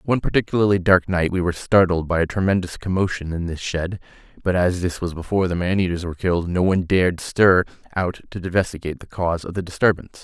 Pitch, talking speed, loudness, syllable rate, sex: 90 Hz, 210 wpm, -21 LUFS, 6.6 syllables/s, male